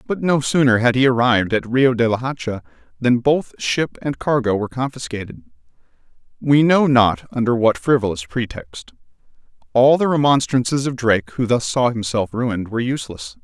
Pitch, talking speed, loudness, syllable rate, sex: 120 Hz, 165 wpm, -18 LUFS, 5.4 syllables/s, male